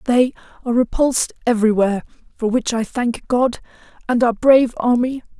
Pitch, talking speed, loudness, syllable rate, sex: 240 Hz, 145 wpm, -18 LUFS, 5.7 syllables/s, female